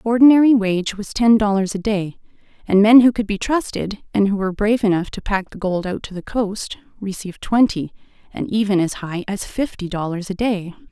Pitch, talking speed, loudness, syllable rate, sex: 205 Hz, 210 wpm, -19 LUFS, 5.5 syllables/s, female